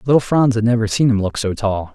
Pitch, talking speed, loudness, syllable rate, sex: 115 Hz, 280 wpm, -17 LUFS, 6.0 syllables/s, male